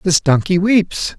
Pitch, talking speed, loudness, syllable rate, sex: 175 Hz, 150 wpm, -15 LUFS, 3.7 syllables/s, male